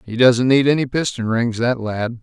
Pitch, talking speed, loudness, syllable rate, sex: 120 Hz, 215 wpm, -17 LUFS, 4.7 syllables/s, male